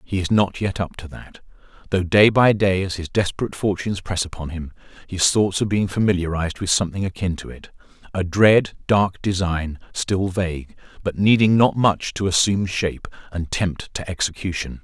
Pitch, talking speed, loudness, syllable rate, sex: 95 Hz, 180 wpm, -20 LUFS, 5.4 syllables/s, male